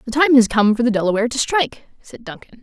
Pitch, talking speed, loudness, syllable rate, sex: 235 Hz, 250 wpm, -16 LUFS, 6.8 syllables/s, female